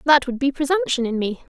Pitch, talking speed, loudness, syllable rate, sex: 275 Hz, 230 wpm, -21 LUFS, 5.9 syllables/s, female